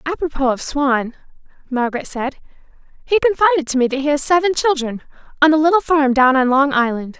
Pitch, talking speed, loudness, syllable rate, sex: 285 Hz, 175 wpm, -16 LUFS, 5.9 syllables/s, female